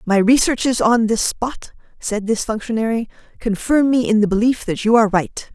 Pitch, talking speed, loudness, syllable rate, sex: 225 Hz, 185 wpm, -17 LUFS, 5.2 syllables/s, female